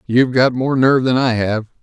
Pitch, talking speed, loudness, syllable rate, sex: 125 Hz, 230 wpm, -15 LUFS, 5.7 syllables/s, male